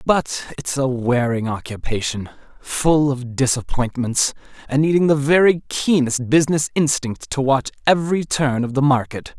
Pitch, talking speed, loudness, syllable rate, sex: 135 Hz, 140 wpm, -19 LUFS, 4.6 syllables/s, male